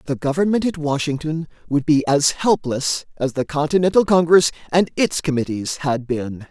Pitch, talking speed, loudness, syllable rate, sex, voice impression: 150 Hz, 155 wpm, -19 LUFS, 4.9 syllables/s, male, masculine, adult-like, powerful, bright, clear, fluent, slightly raspy, slightly cool, refreshing, friendly, wild, lively, intense